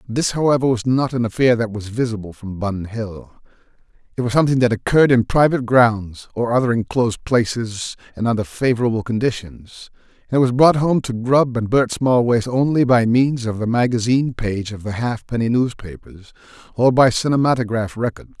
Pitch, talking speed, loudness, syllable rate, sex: 120 Hz, 175 wpm, -18 LUFS, 5.4 syllables/s, male